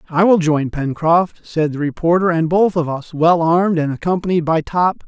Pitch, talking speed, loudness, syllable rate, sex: 165 Hz, 200 wpm, -16 LUFS, 5.1 syllables/s, male